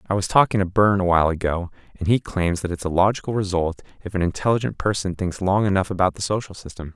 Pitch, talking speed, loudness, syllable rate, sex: 95 Hz, 225 wpm, -21 LUFS, 6.7 syllables/s, male